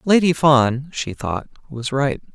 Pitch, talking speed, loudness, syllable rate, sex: 140 Hz, 155 wpm, -19 LUFS, 3.7 syllables/s, male